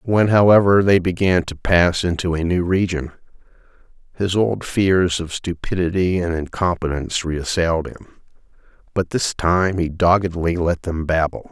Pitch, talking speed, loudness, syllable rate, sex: 90 Hz, 140 wpm, -19 LUFS, 4.7 syllables/s, male